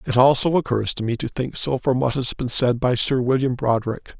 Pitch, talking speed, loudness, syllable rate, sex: 125 Hz, 245 wpm, -21 LUFS, 5.2 syllables/s, male